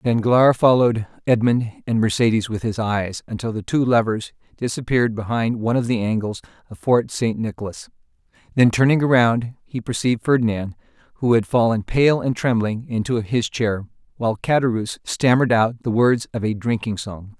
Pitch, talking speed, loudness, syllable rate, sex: 115 Hz, 160 wpm, -20 LUFS, 5.2 syllables/s, male